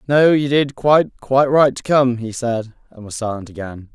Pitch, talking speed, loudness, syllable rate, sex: 125 Hz, 215 wpm, -17 LUFS, 5.0 syllables/s, male